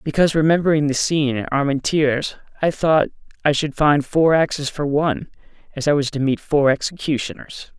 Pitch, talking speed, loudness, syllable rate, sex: 145 Hz, 170 wpm, -19 LUFS, 5.6 syllables/s, male